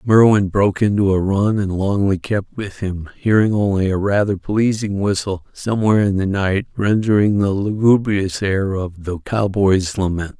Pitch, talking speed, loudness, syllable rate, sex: 100 Hz, 160 wpm, -18 LUFS, 4.6 syllables/s, male